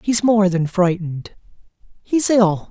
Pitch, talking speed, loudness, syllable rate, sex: 195 Hz, 110 wpm, -17 LUFS, 4.1 syllables/s, male